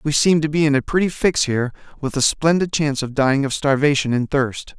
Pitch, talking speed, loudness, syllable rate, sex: 145 Hz, 240 wpm, -19 LUFS, 5.9 syllables/s, male